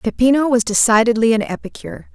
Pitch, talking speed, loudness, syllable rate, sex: 235 Hz, 140 wpm, -15 LUFS, 6.4 syllables/s, female